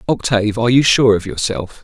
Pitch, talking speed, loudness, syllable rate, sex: 115 Hz, 195 wpm, -15 LUFS, 6.0 syllables/s, male